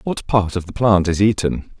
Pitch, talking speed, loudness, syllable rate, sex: 100 Hz, 235 wpm, -18 LUFS, 4.8 syllables/s, male